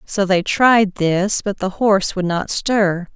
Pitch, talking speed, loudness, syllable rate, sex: 195 Hz, 190 wpm, -17 LUFS, 3.6 syllables/s, female